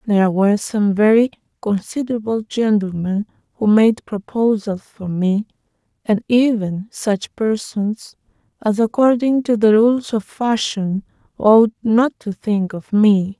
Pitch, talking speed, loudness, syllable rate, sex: 215 Hz, 125 wpm, -17 LUFS, 3.9 syllables/s, female